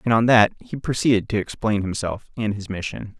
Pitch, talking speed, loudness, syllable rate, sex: 110 Hz, 205 wpm, -22 LUFS, 5.4 syllables/s, male